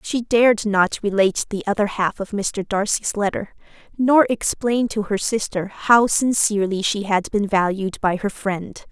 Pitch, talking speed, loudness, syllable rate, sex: 205 Hz, 170 wpm, -20 LUFS, 4.5 syllables/s, female